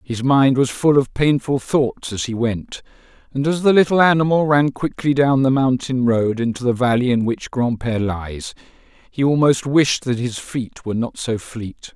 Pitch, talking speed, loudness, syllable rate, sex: 130 Hz, 190 wpm, -18 LUFS, 4.6 syllables/s, male